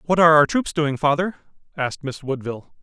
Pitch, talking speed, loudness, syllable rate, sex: 150 Hz, 190 wpm, -20 LUFS, 6.5 syllables/s, male